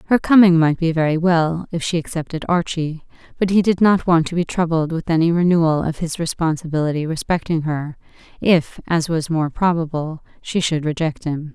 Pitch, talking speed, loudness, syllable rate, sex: 165 Hz, 180 wpm, -19 LUFS, 5.3 syllables/s, female